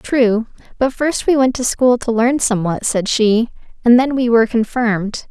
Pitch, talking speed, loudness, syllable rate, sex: 235 Hz, 190 wpm, -16 LUFS, 4.7 syllables/s, female